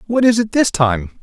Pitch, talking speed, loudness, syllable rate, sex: 185 Hz, 245 wpm, -15 LUFS, 4.7 syllables/s, male